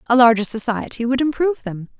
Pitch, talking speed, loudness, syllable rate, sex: 245 Hz, 180 wpm, -18 LUFS, 6.2 syllables/s, female